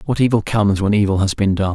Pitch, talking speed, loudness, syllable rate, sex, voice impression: 100 Hz, 275 wpm, -17 LUFS, 6.6 syllables/s, male, very masculine, very middle-aged, tensed, very powerful, bright, slightly soft, slightly muffled, fluent, slightly raspy, cool, very intellectual, refreshing, slightly sincere, calm, mature, very friendly, very reassuring, unique, slightly elegant, slightly wild, sweet, lively, kind, slightly intense, slightly modest